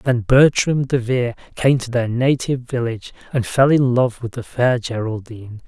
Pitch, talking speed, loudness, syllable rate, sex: 125 Hz, 170 wpm, -18 LUFS, 5.0 syllables/s, male